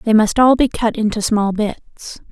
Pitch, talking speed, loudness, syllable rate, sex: 220 Hz, 205 wpm, -16 LUFS, 4.2 syllables/s, female